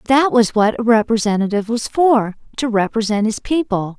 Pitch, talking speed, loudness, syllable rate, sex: 230 Hz, 150 wpm, -17 LUFS, 5.3 syllables/s, female